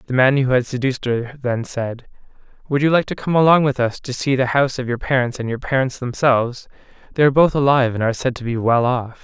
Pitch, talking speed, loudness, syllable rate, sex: 130 Hz, 245 wpm, -18 LUFS, 6.3 syllables/s, male